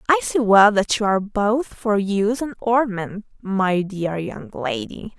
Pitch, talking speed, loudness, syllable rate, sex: 215 Hz, 175 wpm, -20 LUFS, 4.2 syllables/s, female